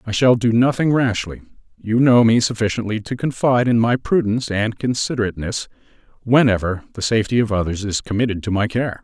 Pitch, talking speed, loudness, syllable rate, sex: 115 Hz, 175 wpm, -18 LUFS, 6.0 syllables/s, male